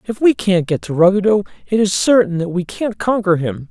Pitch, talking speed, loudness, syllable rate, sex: 190 Hz, 225 wpm, -16 LUFS, 5.3 syllables/s, male